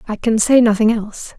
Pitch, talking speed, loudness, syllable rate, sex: 220 Hz, 215 wpm, -15 LUFS, 5.9 syllables/s, female